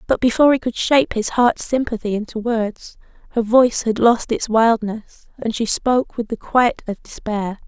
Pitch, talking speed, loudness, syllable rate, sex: 230 Hz, 190 wpm, -18 LUFS, 4.9 syllables/s, female